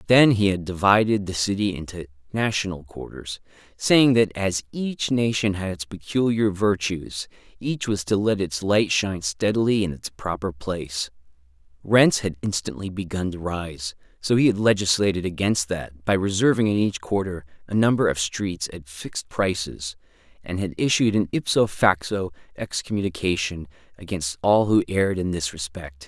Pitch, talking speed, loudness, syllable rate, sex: 95 Hz, 155 wpm, -23 LUFS, 4.8 syllables/s, male